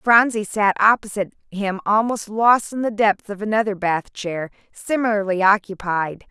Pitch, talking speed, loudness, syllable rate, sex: 205 Hz, 145 wpm, -20 LUFS, 4.7 syllables/s, female